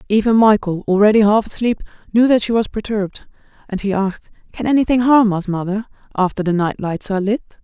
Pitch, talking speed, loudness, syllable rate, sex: 210 Hz, 190 wpm, -17 LUFS, 6.2 syllables/s, female